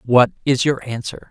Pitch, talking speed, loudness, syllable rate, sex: 125 Hz, 185 wpm, -19 LUFS, 4.8 syllables/s, male